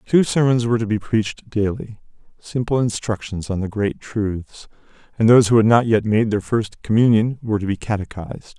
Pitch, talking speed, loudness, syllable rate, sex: 110 Hz, 175 wpm, -19 LUFS, 5.4 syllables/s, male